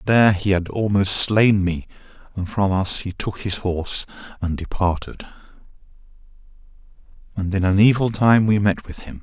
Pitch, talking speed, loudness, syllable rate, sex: 100 Hz, 165 wpm, -20 LUFS, 5.0 syllables/s, male